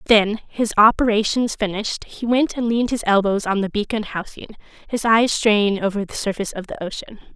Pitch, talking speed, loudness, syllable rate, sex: 215 Hz, 190 wpm, -20 LUFS, 5.7 syllables/s, female